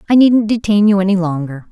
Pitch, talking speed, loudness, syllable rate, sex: 200 Hz, 210 wpm, -13 LUFS, 6.0 syllables/s, female